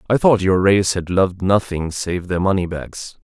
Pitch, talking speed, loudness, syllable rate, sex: 95 Hz, 185 wpm, -18 LUFS, 4.6 syllables/s, male